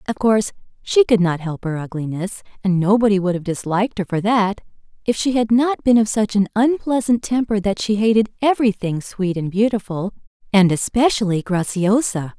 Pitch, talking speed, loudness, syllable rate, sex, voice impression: 205 Hz, 175 wpm, -19 LUFS, 5.3 syllables/s, female, feminine, adult-like, tensed, powerful, bright, soft, fluent, friendly, reassuring, elegant, slightly kind, slightly intense